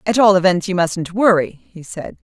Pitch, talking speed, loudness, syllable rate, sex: 185 Hz, 205 wpm, -15 LUFS, 4.8 syllables/s, female